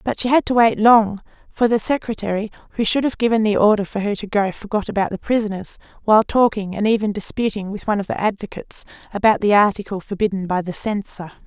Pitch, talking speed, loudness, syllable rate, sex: 210 Hz, 210 wpm, -19 LUFS, 6.3 syllables/s, female